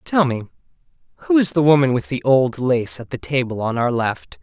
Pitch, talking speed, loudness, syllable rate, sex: 130 Hz, 215 wpm, -19 LUFS, 5.2 syllables/s, male